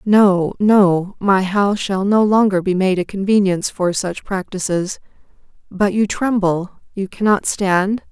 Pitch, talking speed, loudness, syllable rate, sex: 195 Hz, 150 wpm, -17 LUFS, 4.2 syllables/s, female